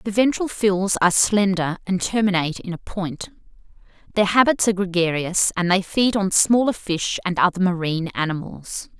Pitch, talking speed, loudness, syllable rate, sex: 190 Hz, 160 wpm, -20 LUFS, 5.2 syllables/s, female